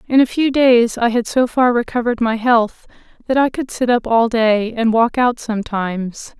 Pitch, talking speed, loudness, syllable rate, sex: 235 Hz, 205 wpm, -16 LUFS, 4.8 syllables/s, female